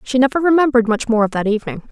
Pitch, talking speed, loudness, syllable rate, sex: 245 Hz, 250 wpm, -16 LUFS, 7.7 syllables/s, female